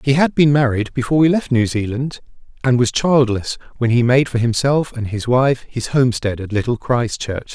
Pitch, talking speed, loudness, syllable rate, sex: 125 Hz, 200 wpm, -17 LUFS, 5.1 syllables/s, male